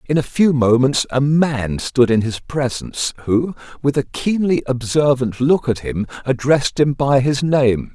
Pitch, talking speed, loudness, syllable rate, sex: 135 Hz, 175 wpm, -17 LUFS, 4.3 syllables/s, male